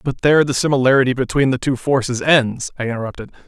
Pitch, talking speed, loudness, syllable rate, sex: 130 Hz, 190 wpm, -17 LUFS, 6.7 syllables/s, male